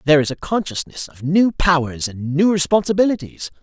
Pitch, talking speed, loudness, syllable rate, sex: 160 Hz, 165 wpm, -18 LUFS, 5.5 syllables/s, male